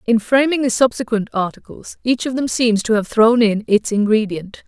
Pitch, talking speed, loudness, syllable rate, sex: 225 Hz, 195 wpm, -17 LUFS, 5.0 syllables/s, female